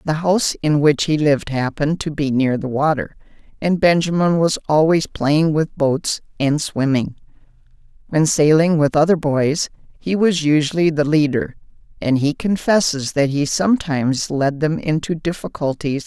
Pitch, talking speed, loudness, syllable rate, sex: 155 Hz, 155 wpm, -18 LUFS, 4.7 syllables/s, female